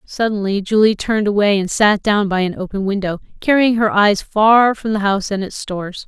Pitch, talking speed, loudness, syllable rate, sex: 205 Hz, 205 wpm, -16 LUFS, 5.4 syllables/s, female